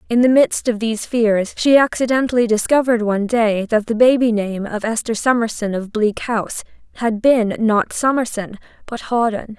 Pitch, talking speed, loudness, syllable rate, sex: 225 Hz, 170 wpm, -17 LUFS, 5.1 syllables/s, female